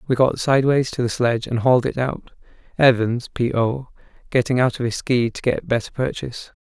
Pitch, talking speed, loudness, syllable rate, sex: 125 Hz, 200 wpm, -20 LUFS, 5.8 syllables/s, male